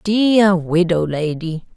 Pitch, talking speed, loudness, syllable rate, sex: 180 Hz, 100 wpm, -16 LUFS, 3.1 syllables/s, female